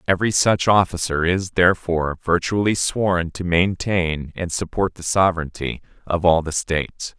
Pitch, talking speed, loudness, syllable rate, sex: 90 Hz, 140 wpm, -20 LUFS, 4.8 syllables/s, male